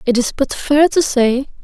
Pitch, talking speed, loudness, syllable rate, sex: 270 Hz, 220 wpm, -15 LUFS, 4.4 syllables/s, female